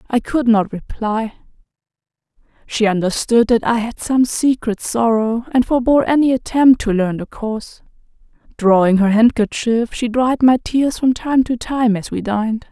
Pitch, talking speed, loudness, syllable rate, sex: 230 Hz, 160 wpm, -16 LUFS, 4.7 syllables/s, female